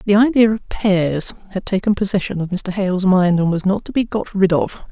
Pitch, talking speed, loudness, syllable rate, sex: 195 Hz, 245 wpm, -18 LUFS, 5.5 syllables/s, female